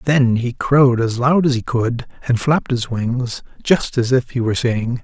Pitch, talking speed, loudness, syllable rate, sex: 125 Hz, 215 wpm, -18 LUFS, 4.7 syllables/s, male